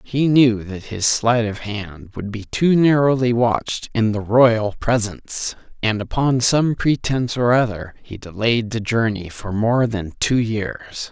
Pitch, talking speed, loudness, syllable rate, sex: 115 Hz, 165 wpm, -19 LUFS, 4.0 syllables/s, male